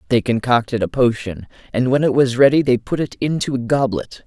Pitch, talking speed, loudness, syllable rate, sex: 125 Hz, 210 wpm, -18 LUFS, 5.6 syllables/s, male